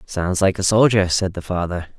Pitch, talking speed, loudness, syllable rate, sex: 95 Hz, 210 wpm, -19 LUFS, 4.9 syllables/s, male